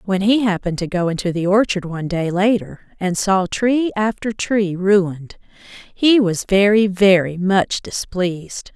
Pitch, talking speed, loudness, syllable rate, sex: 195 Hz, 160 wpm, -18 LUFS, 4.4 syllables/s, female